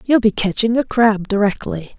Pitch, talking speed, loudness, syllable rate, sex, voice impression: 215 Hz, 180 wpm, -17 LUFS, 4.8 syllables/s, female, very feminine, very adult-like, slightly middle-aged, very thin, slightly relaxed, slightly weak, bright, very soft, very clear, fluent, slightly raspy, very cute, intellectual, refreshing, very sincere, very calm, very friendly, reassuring, very unique, very elegant, slightly wild, sweet, very kind, very modest